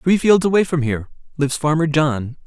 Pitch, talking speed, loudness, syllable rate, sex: 150 Hz, 195 wpm, -18 LUFS, 5.8 syllables/s, male